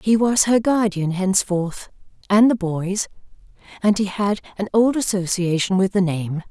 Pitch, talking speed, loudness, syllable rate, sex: 195 Hz, 155 wpm, -20 LUFS, 4.5 syllables/s, female